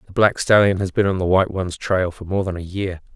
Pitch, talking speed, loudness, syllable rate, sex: 95 Hz, 285 wpm, -20 LUFS, 6.2 syllables/s, male